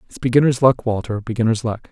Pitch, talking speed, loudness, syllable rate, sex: 120 Hz, 190 wpm, -18 LUFS, 6.7 syllables/s, male